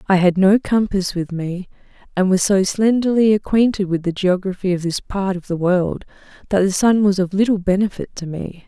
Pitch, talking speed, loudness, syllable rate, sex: 190 Hz, 200 wpm, -18 LUFS, 5.2 syllables/s, female